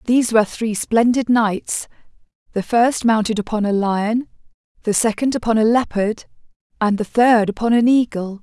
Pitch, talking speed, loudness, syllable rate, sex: 225 Hz, 155 wpm, -18 LUFS, 4.9 syllables/s, female